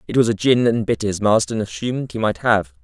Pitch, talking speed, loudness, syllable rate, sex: 110 Hz, 230 wpm, -19 LUFS, 5.8 syllables/s, male